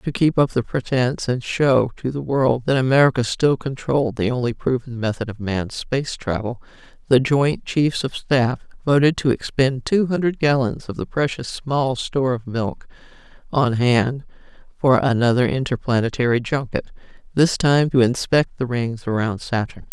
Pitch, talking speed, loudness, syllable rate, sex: 130 Hz, 165 wpm, -20 LUFS, 4.8 syllables/s, female